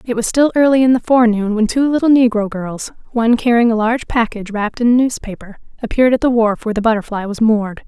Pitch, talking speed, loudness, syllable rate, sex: 230 Hz, 230 wpm, -15 LUFS, 6.7 syllables/s, female